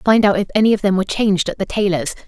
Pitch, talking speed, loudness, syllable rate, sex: 195 Hz, 290 wpm, -17 LUFS, 7.5 syllables/s, female